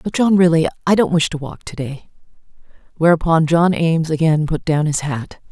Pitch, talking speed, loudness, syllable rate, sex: 160 Hz, 195 wpm, -17 LUFS, 5.3 syllables/s, female